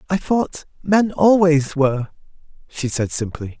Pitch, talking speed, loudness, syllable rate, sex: 155 Hz, 135 wpm, -18 LUFS, 4.2 syllables/s, male